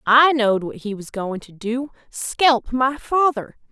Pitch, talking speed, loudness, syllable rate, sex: 245 Hz, 160 wpm, -20 LUFS, 3.9 syllables/s, female